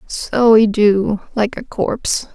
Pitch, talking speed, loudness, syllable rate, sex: 215 Hz, 155 wpm, -16 LUFS, 3.4 syllables/s, female